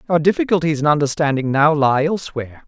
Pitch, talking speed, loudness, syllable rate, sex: 150 Hz, 155 wpm, -17 LUFS, 6.4 syllables/s, male